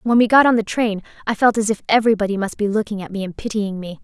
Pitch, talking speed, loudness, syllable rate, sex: 210 Hz, 285 wpm, -18 LUFS, 6.9 syllables/s, female